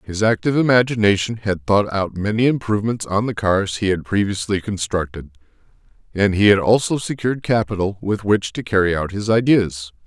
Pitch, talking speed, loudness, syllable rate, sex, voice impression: 105 Hz, 165 wpm, -19 LUFS, 5.4 syllables/s, male, masculine, adult-like, tensed, powerful, clear, mature, friendly, slightly reassuring, wild, lively, slightly strict